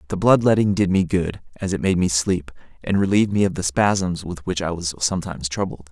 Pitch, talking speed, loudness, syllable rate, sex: 90 Hz, 235 wpm, -21 LUFS, 5.8 syllables/s, male